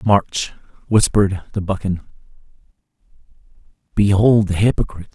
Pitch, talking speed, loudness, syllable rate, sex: 100 Hz, 80 wpm, -18 LUFS, 5.2 syllables/s, male